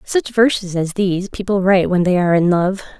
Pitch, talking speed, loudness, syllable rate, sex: 190 Hz, 220 wpm, -16 LUFS, 5.8 syllables/s, female